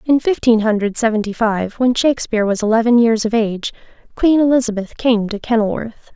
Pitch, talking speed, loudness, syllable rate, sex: 225 Hz, 165 wpm, -16 LUFS, 5.7 syllables/s, female